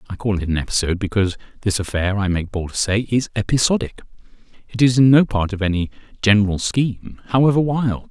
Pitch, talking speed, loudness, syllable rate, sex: 105 Hz, 185 wpm, -19 LUFS, 6.2 syllables/s, male